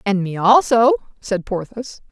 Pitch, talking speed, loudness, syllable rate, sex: 210 Hz, 140 wpm, -17 LUFS, 4.2 syllables/s, female